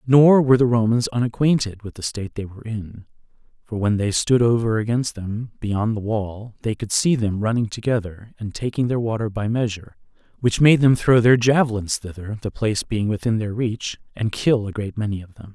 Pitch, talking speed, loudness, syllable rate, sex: 110 Hz, 205 wpm, -21 LUFS, 5.4 syllables/s, male